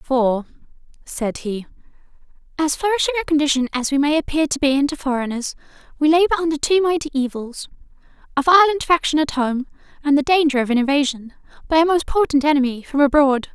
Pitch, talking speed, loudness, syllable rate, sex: 290 Hz, 175 wpm, -18 LUFS, 6.1 syllables/s, female